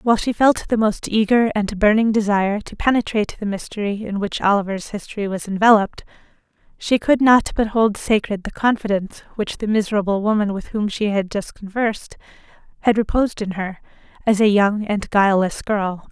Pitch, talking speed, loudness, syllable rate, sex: 210 Hz, 175 wpm, -19 LUFS, 5.6 syllables/s, female